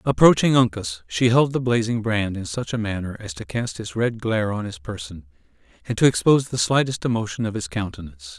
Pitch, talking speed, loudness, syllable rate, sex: 105 Hz, 205 wpm, -22 LUFS, 5.7 syllables/s, male